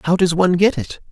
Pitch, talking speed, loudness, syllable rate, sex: 175 Hz, 270 wpm, -16 LUFS, 6.5 syllables/s, male